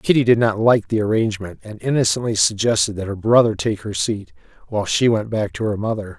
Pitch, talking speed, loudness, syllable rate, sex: 110 Hz, 215 wpm, -19 LUFS, 5.9 syllables/s, male